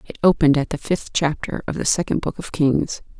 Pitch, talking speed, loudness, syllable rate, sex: 155 Hz, 225 wpm, -21 LUFS, 5.7 syllables/s, female